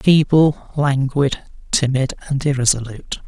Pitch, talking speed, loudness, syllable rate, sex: 140 Hz, 90 wpm, -18 LUFS, 4.2 syllables/s, male